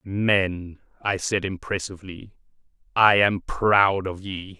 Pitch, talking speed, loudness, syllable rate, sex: 95 Hz, 120 wpm, -22 LUFS, 3.5 syllables/s, male